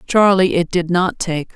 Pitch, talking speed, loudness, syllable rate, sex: 175 Hz, 195 wpm, -16 LUFS, 4.3 syllables/s, female